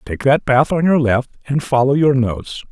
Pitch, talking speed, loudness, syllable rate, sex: 130 Hz, 220 wpm, -16 LUFS, 4.7 syllables/s, male